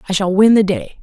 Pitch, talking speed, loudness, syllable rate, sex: 200 Hz, 295 wpm, -14 LUFS, 6.1 syllables/s, female